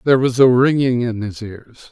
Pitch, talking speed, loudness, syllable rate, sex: 120 Hz, 220 wpm, -16 LUFS, 5.0 syllables/s, male